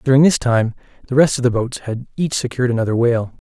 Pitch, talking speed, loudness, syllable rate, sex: 125 Hz, 225 wpm, -18 LUFS, 6.6 syllables/s, male